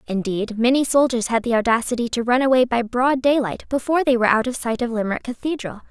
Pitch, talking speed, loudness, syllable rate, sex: 245 Hz, 215 wpm, -20 LUFS, 6.4 syllables/s, female